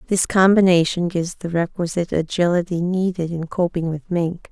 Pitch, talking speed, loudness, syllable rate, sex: 175 Hz, 145 wpm, -20 LUFS, 5.4 syllables/s, female